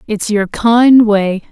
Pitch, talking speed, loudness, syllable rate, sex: 215 Hz, 160 wpm, -11 LUFS, 3.1 syllables/s, female